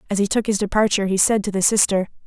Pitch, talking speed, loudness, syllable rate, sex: 200 Hz, 265 wpm, -19 LUFS, 7.3 syllables/s, female